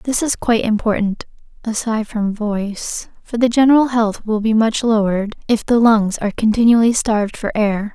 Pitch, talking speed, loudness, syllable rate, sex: 220 Hz, 175 wpm, -17 LUFS, 5.3 syllables/s, female